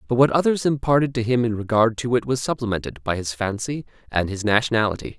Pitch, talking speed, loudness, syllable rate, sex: 120 Hz, 210 wpm, -22 LUFS, 6.3 syllables/s, male